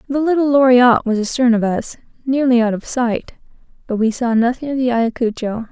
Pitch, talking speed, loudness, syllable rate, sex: 245 Hz, 190 wpm, -16 LUFS, 5.6 syllables/s, female